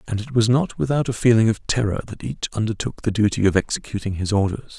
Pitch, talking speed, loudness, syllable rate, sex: 110 Hz, 225 wpm, -21 LUFS, 6.1 syllables/s, male